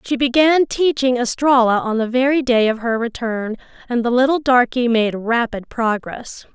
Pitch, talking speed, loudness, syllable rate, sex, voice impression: 245 Hz, 165 wpm, -17 LUFS, 4.6 syllables/s, female, feminine, adult-like, tensed, slightly powerful, bright, soft, clear, slightly muffled, calm, friendly, reassuring, elegant, kind